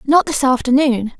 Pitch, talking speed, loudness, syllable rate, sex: 265 Hz, 150 wpm, -15 LUFS, 4.8 syllables/s, female